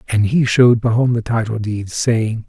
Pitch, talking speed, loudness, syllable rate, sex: 115 Hz, 195 wpm, -16 LUFS, 4.9 syllables/s, male